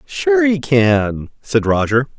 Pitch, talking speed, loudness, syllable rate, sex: 130 Hz, 135 wpm, -15 LUFS, 3.2 syllables/s, male